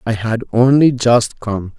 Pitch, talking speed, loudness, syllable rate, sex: 115 Hz, 170 wpm, -15 LUFS, 3.9 syllables/s, male